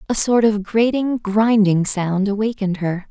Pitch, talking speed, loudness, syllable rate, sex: 210 Hz, 155 wpm, -18 LUFS, 4.5 syllables/s, female